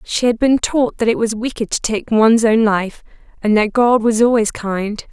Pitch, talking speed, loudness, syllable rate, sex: 225 Hz, 225 wpm, -16 LUFS, 4.8 syllables/s, female